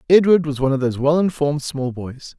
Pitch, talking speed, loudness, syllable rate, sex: 145 Hz, 225 wpm, -18 LUFS, 6.3 syllables/s, male